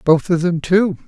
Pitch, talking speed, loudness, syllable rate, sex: 170 Hz, 225 wpm, -16 LUFS, 4.4 syllables/s, male